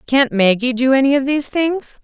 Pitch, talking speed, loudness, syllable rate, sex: 265 Hz, 205 wpm, -16 LUFS, 5.3 syllables/s, female